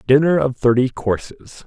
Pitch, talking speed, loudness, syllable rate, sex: 130 Hz, 145 wpm, -17 LUFS, 4.6 syllables/s, male